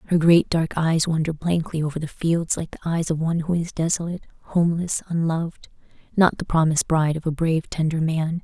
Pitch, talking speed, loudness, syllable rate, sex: 165 Hz, 200 wpm, -22 LUFS, 6.0 syllables/s, female